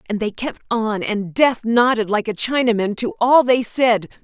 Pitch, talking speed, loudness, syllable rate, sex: 225 Hz, 200 wpm, -18 LUFS, 4.4 syllables/s, female